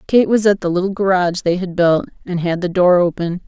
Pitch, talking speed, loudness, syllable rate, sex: 180 Hz, 240 wpm, -16 LUFS, 5.8 syllables/s, female